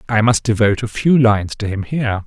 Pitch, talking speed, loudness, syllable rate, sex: 110 Hz, 240 wpm, -16 LUFS, 6.2 syllables/s, male